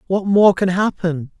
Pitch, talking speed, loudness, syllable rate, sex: 185 Hz, 170 wpm, -16 LUFS, 4.2 syllables/s, male